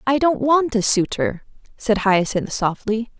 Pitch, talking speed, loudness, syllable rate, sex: 230 Hz, 150 wpm, -19 LUFS, 4.1 syllables/s, female